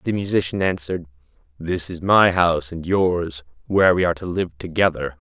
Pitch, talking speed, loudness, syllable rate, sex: 85 Hz, 170 wpm, -20 LUFS, 5.5 syllables/s, male